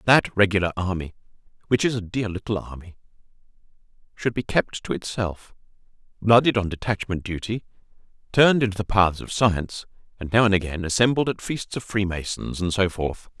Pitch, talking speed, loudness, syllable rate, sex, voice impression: 100 Hz, 165 wpm, -23 LUFS, 5.5 syllables/s, male, very masculine, very adult-like, slightly thick, fluent, slightly cool, sincere, reassuring